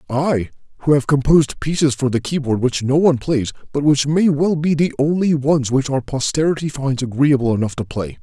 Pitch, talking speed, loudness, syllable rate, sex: 140 Hz, 205 wpm, -18 LUFS, 5.4 syllables/s, male